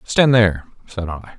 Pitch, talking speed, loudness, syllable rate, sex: 105 Hz, 175 wpm, -17 LUFS, 4.7 syllables/s, male